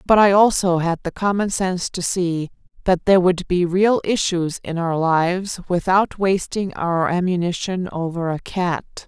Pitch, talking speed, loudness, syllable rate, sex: 180 Hz, 165 wpm, -19 LUFS, 4.4 syllables/s, female